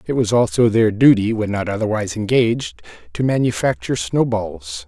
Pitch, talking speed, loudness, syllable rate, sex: 115 Hz, 160 wpm, -18 LUFS, 5.4 syllables/s, male